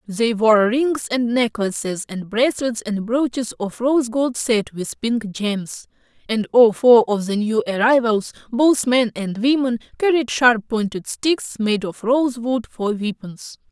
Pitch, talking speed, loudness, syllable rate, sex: 235 Hz, 155 wpm, -19 LUFS, 4.0 syllables/s, female